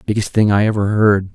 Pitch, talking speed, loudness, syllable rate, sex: 105 Hz, 220 wpm, -15 LUFS, 5.1 syllables/s, male